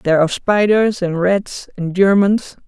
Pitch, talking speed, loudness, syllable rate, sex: 190 Hz, 155 wpm, -16 LUFS, 4.4 syllables/s, female